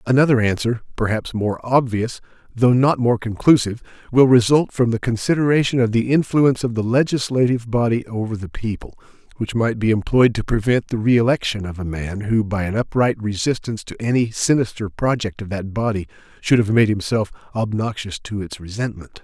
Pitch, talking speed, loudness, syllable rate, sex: 115 Hz, 170 wpm, -19 LUFS, 5.5 syllables/s, male